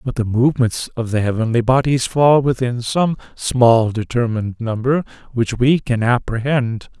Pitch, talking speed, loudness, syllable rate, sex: 120 Hz, 145 wpm, -17 LUFS, 4.6 syllables/s, male